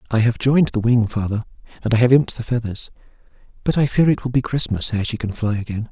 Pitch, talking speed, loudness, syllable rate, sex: 115 Hz, 245 wpm, -19 LUFS, 6.6 syllables/s, male